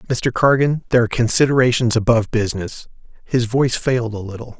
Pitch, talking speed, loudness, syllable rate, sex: 120 Hz, 155 wpm, -17 LUFS, 6.3 syllables/s, male